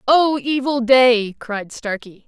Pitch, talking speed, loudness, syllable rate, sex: 245 Hz, 130 wpm, -17 LUFS, 3.3 syllables/s, female